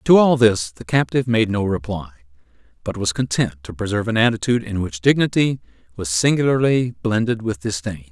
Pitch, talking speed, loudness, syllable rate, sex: 110 Hz, 170 wpm, -19 LUFS, 5.8 syllables/s, male